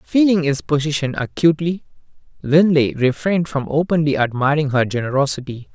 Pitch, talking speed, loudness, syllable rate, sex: 150 Hz, 115 wpm, -18 LUFS, 5.6 syllables/s, male